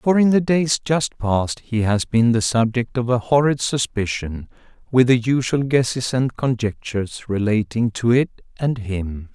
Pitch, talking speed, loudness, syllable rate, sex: 120 Hz, 165 wpm, -20 LUFS, 4.3 syllables/s, male